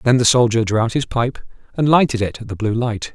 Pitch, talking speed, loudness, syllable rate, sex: 120 Hz, 265 wpm, -18 LUFS, 5.8 syllables/s, male